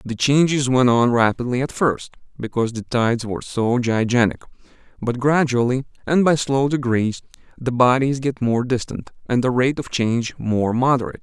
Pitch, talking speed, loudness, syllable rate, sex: 125 Hz, 165 wpm, -19 LUFS, 5.1 syllables/s, male